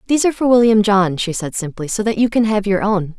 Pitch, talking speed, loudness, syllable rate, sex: 210 Hz, 280 wpm, -16 LUFS, 6.4 syllables/s, female